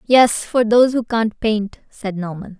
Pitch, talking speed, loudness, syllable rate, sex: 220 Hz, 185 wpm, -17 LUFS, 4.2 syllables/s, female